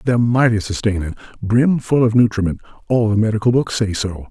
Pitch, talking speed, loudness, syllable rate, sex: 110 Hz, 155 wpm, -17 LUFS, 5.8 syllables/s, male